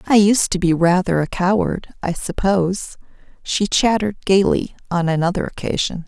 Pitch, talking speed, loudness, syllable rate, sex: 185 Hz, 150 wpm, -18 LUFS, 5.0 syllables/s, female